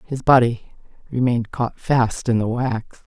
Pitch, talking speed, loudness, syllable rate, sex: 120 Hz, 150 wpm, -20 LUFS, 4.2 syllables/s, female